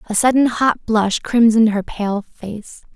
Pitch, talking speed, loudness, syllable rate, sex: 220 Hz, 165 wpm, -16 LUFS, 4.1 syllables/s, female